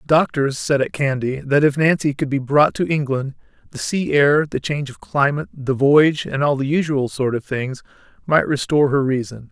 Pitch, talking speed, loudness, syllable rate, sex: 140 Hz, 210 wpm, -19 LUFS, 5.3 syllables/s, male